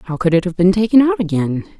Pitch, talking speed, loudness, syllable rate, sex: 180 Hz, 270 wpm, -15 LUFS, 6.2 syllables/s, female